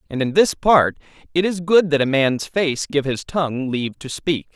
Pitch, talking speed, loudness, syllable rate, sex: 150 Hz, 225 wpm, -19 LUFS, 4.8 syllables/s, male